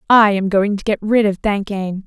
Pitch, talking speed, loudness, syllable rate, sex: 205 Hz, 230 wpm, -17 LUFS, 5.3 syllables/s, female